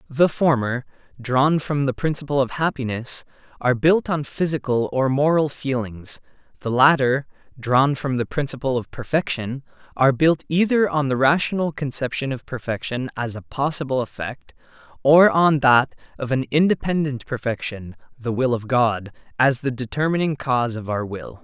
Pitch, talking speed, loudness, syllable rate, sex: 135 Hz, 150 wpm, -21 LUFS, 4.9 syllables/s, male